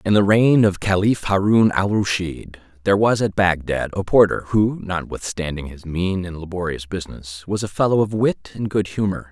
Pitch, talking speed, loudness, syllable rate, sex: 95 Hz, 185 wpm, -20 LUFS, 5.0 syllables/s, male